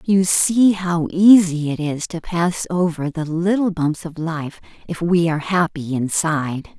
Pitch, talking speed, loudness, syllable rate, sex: 170 Hz, 170 wpm, -18 LUFS, 4.1 syllables/s, female